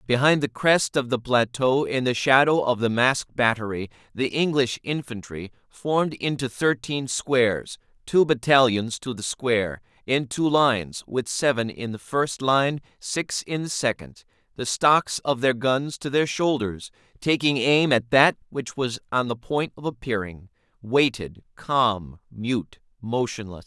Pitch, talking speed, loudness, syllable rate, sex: 125 Hz, 155 wpm, -23 LUFS, 4.2 syllables/s, male